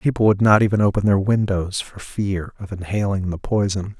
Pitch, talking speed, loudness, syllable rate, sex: 100 Hz, 195 wpm, -20 LUFS, 5.1 syllables/s, male